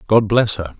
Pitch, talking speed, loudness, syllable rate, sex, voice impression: 105 Hz, 225 wpm, -16 LUFS, 4.8 syllables/s, male, very masculine, very adult-like, very middle-aged, very thick, slightly tensed, powerful, slightly bright, hard, clear, muffled, fluent, slightly raspy, very cool, very intellectual, sincere, very calm, very mature, friendly, very reassuring, very unique, slightly elegant, very wild, sweet, slightly lively, very kind